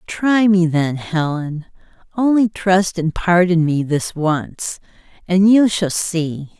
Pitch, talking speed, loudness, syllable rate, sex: 175 Hz, 135 wpm, -17 LUFS, 3.3 syllables/s, female